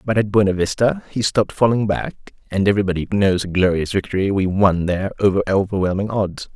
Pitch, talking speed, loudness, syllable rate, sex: 100 Hz, 185 wpm, -19 LUFS, 6.0 syllables/s, male